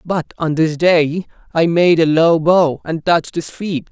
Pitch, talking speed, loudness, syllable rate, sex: 165 Hz, 200 wpm, -15 LUFS, 4.1 syllables/s, male